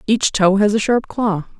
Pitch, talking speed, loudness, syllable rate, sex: 205 Hz, 225 wpm, -16 LUFS, 4.4 syllables/s, female